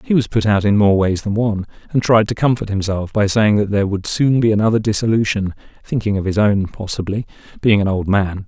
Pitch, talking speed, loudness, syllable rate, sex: 105 Hz, 220 wpm, -17 LUFS, 5.9 syllables/s, male